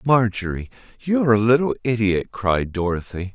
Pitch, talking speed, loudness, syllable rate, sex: 105 Hz, 125 wpm, -21 LUFS, 4.9 syllables/s, male